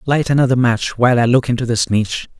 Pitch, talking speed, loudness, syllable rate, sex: 120 Hz, 225 wpm, -15 LUFS, 6.4 syllables/s, male